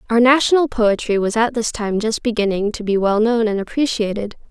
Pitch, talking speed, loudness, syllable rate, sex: 225 Hz, 200 wpm, -18 LUFS, 5.4 syllables/s, female